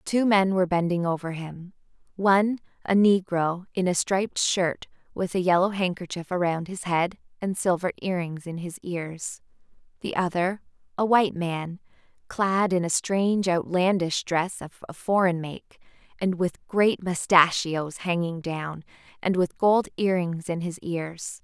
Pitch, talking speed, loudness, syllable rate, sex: 180 Hz, 150 wpm, -25 LUFS, 4.3 syllables/s, female